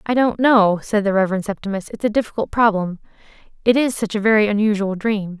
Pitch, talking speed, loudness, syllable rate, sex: 210 Hz, 200 wpm, -18 LUFS, 6.1 syllables/s, female